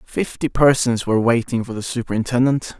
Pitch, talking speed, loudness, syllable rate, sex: 120 Hz, 150 wpm, -19 LUFS, 5.6 syllables/s, male